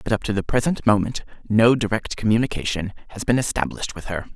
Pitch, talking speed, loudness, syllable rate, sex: 110 Hz, 195 wpm, -22 LUFS, 6.4 syllables/s, male